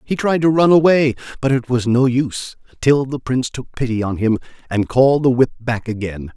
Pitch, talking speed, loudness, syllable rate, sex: 125 Hz, 215 wpm, -17 LUFS, 5.5 syllables/s, male